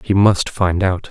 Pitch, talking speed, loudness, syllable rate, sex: 95 Hz, 220 wpm, -16 LUFS, 4.0 syllables/s, male